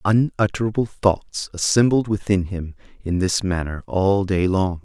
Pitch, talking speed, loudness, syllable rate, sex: 95 Hz, 135 wpm, -21 LUFS, 4.3 syllables/s, male